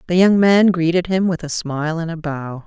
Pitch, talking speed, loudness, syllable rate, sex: 170 Hz, 245 wpm, -17 LUFS, 5.2 syllables/s, female